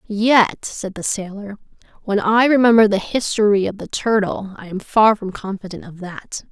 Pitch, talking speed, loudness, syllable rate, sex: 205 Hz, 175 wpm, -18 LUFS, 4.6 syllables/s, female